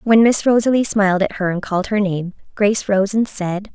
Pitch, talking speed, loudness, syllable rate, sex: 205 Hz, 225 wpm, -17 LUFS, 5.5 syllables/s, female